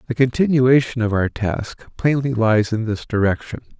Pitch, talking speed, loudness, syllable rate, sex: 115 Hz, 160 wpm, -19 LUFS, 4.9 syllables/s, male